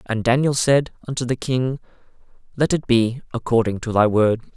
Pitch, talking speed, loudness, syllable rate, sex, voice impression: 120 Hz, 170 wpm, -20 LUFS, 5.2 syllables/s, male, very masculine, young, slightly thick, slightly tensed, slightly weak, bright, soft, very clear, fluent, cool, intellectual, very refreshing, very sincere, calm, very friendly, very reassuring, slightly unique, elegant, slightly wild, sweet, lively, kind, slightly modest